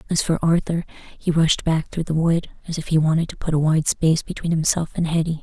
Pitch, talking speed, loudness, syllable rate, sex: 160 Hz, 245 wpm, -21 LUFS, 5.9 syllables/s, female